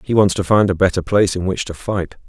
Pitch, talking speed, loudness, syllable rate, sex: 95 Hz, 290 wpm, -17 LUFS, 6.2 syllables/s, male